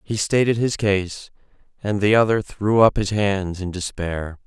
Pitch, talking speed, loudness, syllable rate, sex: 100 Hz, 175 wpm, -20 LUFS, 4.2 syllables/s, male